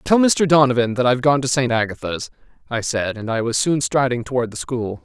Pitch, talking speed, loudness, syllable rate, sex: 125 Hz, 225 wpm, -19 LUFS, 5.7 syllables/s, male